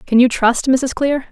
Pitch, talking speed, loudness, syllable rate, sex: 255 Hz, 230 wpm, -15 LUFS, 4.3 syllables/s, female